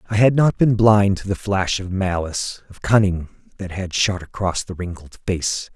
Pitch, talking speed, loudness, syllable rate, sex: 95 Hz, 200 wpm, -20 LUFS, 4.7 syllables/s, male